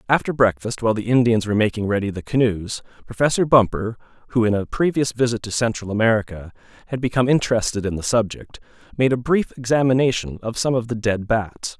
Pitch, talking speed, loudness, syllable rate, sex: 115 Hz, 185 wpm, -20 LUFS, 6.2 syllables/s, male